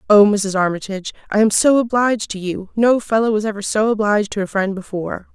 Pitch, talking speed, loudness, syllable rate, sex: 210 Hz, 215 wpm, -18 LUFS, 6.1 syllables/s, female